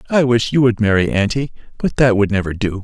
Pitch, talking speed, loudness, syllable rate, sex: 115 Hz, 235 wpm, -16 LUFS, 5.9 syllables/s, male